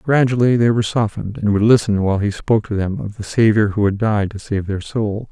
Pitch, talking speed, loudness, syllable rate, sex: 105 Hz, 250 wpm, -17 LUFS, 5.9 syllables/s, male